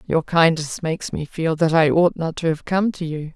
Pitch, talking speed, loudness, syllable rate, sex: 165 Hz, 250 wpm, -20 LUFS, 5.0 syllables/s, female